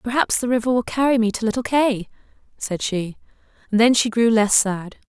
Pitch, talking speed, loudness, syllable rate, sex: 230 Hz, 200 wpm, -19 LUFS, 5.3 syllables/s, female